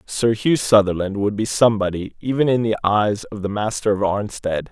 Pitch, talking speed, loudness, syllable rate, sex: 105 Hz, 190 wpm, -19 LUFS, 5.2 syllables/s, male